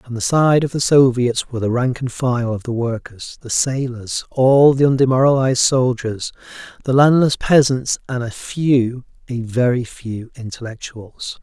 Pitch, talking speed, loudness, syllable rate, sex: 125 Hz, 145 wpm, -17 LUFS, 4.5 syllables/s, male